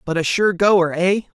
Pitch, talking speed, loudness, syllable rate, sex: 180 Hz, 215 wpm, -17 LUFS, 4.5 syllables/s, male